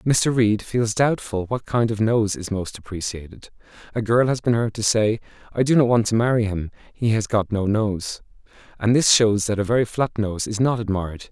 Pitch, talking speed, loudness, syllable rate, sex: 110 Hz, 215 wpm, -21 LUFS, 5.2 syllables/s, male